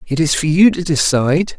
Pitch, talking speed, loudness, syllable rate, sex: 160 Hz, 225 wpm, -14 LUFS, 5.4 syllables/s, male